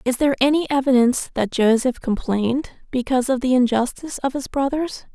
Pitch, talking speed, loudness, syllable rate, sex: 260 Hz, 165 wpm, -20 LUFS, 5.9 syllables/s, female